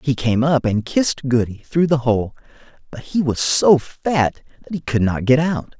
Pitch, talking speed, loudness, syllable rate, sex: 135 Hz, 205 wpm, -18 LUFS, 4.5 syllables/s, male